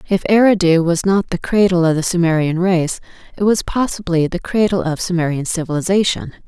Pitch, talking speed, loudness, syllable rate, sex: 180 Hz, 165 wpm, -16 LUFS, 5.6 syllables/s, female